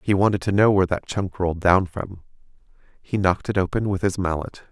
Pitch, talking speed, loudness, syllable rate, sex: 95 Hz, 215 wpm, -22 LUFS, 5.9 syllables/s, male